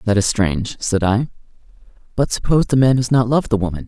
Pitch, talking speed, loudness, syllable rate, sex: 115 Hz, 215 wpm, -17 LUFS, 6.3 syllables/s, male